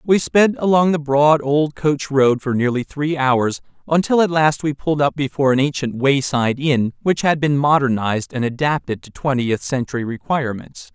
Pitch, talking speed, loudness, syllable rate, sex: 140 Hz, 180 wpm, -18 LUFS, 5.1 syllables/s, male